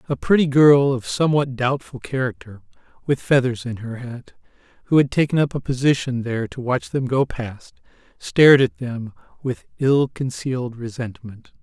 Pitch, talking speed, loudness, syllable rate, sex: 130 Hz, 160 wpm, -20 LUFS, 4.9 syllables/s, male